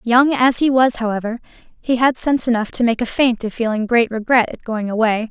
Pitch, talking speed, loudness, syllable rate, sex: 235 Hz, 225 wpm, -17 LUFS, 5.6 syllables/s, female